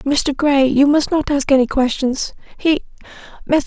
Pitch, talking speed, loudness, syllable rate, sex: 280 Hz, 145 wpm, -16 LUFS, 4.4 syllables/s, female